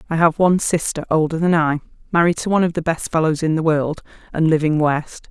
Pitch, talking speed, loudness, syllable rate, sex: 160 Hz, 225 wpm, -18 LUFS, 6.1 syllables/s, female